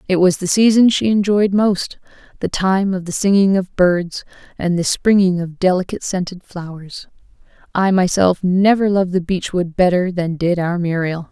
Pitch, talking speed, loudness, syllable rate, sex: 185 Hz, 170 wpm, -16 LUFS, 4.8 syllables/s, female